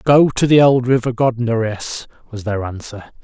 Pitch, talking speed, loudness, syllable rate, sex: 120 Hz, 185 wpm, -16 LUFS, 4.6 syllables/s, male